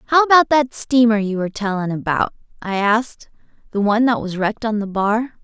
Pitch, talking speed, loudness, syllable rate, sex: 220 Hz, 200 wpm, -18 LUFS, 5.6 syllables/s, female